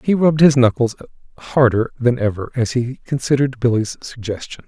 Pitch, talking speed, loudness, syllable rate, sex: 125 Hz, 155 wpm, -18 LUFS, 5.6 syllables/s, male